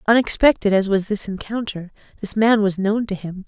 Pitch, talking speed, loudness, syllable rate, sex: 205 Hz, 190 wpm, -19 LUFS, 5.3 syllables/s, female